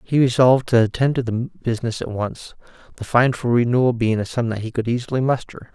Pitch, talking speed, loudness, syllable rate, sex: 120 Hz, 220 wpm, -20 LUFS, 6.0 syllables/s, male